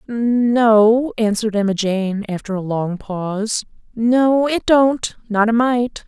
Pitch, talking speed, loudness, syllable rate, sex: 225 Hz, 140 wpm, -17 LUFS, 3.5 syllables/s, female